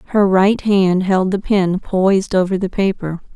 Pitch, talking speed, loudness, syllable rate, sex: 190 Hz, 180 wpm, -16 LUFS, 4.1 syllables/s, female